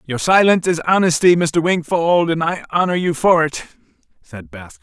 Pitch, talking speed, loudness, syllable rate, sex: 160 Hz, 175 wpm, -16 LUFS, 5.3 syllables/s, male